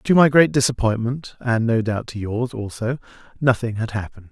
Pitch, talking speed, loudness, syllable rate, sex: 115 Hz, 180 wpm, -20 LUFS, 4.2 syllables/s, male